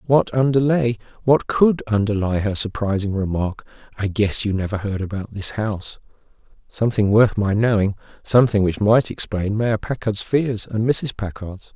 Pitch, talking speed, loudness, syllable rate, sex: 110 Hz, 150 wpm, -20 LUFS, 4.8 syllables/s, male